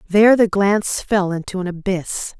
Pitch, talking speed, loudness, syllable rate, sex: 195 Hz, 175 wpm, -18 LUFS, 5.1 syllables/s, female